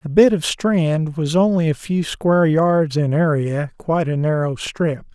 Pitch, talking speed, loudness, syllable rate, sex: 160 Hz, 185 wpm, -18 LUFS, 4.2 syllables/s, male